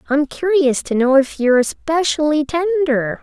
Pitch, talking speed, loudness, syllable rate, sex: 295 Hz, 150 wpm, -16 LUFS, 4.6 syllables/s, female